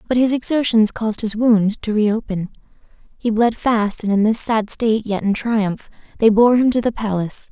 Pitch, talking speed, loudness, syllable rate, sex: 220 Hz, 200 wpm, -18 LUFS, 5.1 syllables/s, female